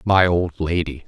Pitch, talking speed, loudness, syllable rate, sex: 85 Hz, 165 wpm, -20 LUFS, 4.1 syllables/s, male